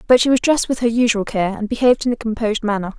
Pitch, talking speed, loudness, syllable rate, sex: 225 Hz, 280 wpm, -18 LUFS, 7.5 syllables/s, female